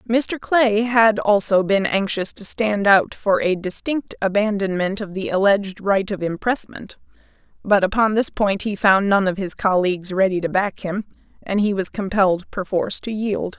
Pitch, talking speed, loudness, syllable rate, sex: 200 Hz, 175 wpm, -19 LUFS, 4.7 syllables/s, female